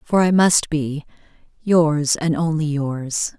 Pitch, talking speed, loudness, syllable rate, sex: 155 Hz, 140 wpm, -19 LUFS, 3.3 syllables/s, female